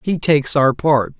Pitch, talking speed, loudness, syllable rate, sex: 145 Hz, 200 wpm, -16 LUFS, 4.7 syllables/s, male